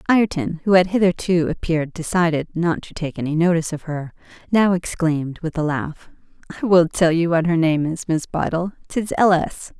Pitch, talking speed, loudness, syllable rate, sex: 170 Hz, 190 wpm, -20 LUFS, 5.4 syllables/s, female